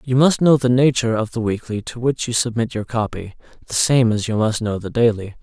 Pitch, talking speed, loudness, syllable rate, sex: 115 Hz, 245 wpm, -19 LUFS, 5.7 syllables/s, male